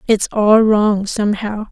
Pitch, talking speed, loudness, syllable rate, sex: 210 Hz, 140 wpm, -15 LUFS, 4.0 syllables/s, female